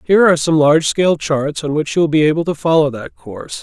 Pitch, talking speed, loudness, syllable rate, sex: 155 Hz, 250 wpm, -14 LUFS, 6.3 syllables/s, male